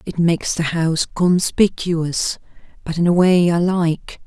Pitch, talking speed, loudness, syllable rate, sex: 170 Hz, 155 wpm, -18 LUFS, 4.2 syllables/s, female